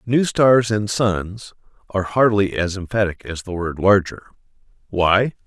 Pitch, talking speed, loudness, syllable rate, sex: 100 Hz, 145 wpm, -19 LUFS, 4.2 syllables/s, male